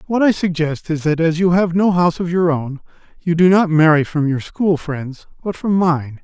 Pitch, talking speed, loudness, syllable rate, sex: 165 Hz, 230 wpm, -16 LUFS, 4.9 syllables/s, male